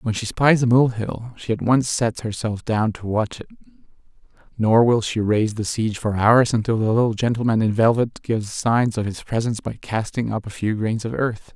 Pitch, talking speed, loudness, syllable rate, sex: 115 Hz, 220 wpm, -21 LUFS, 5.2 syllables/s, male